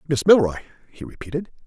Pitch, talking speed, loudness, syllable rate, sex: 145 Hz, 145 wpm, -20 LUFS, 6.4 syllables/s, male